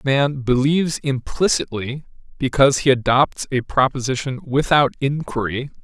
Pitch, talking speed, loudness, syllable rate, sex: 135 Hz, 115 wpm, -19 LUFS, 4.8 syllables/s, male